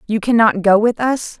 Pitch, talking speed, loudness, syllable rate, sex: 225 Hz, 215 wpm, -15 LUFS, 4.9 syllables/s, female